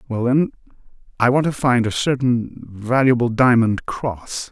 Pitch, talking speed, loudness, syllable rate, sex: 125 Hz, 145 wpm, -18 LUFS, 4.2 syllables/s, male